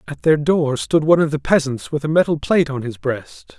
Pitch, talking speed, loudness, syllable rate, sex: 145 Hz, 250 wpm, -18 LUFS, 5.5 syllables/s, male